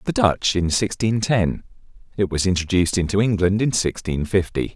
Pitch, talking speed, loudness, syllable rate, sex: 95 Hz, 165 wpm, -20 LUFS, 5.1 syllables/s, male